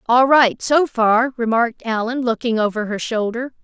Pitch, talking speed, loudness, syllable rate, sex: 235 Hz, 165 wpm, -18 LUFS, 4.7 syllables/s, female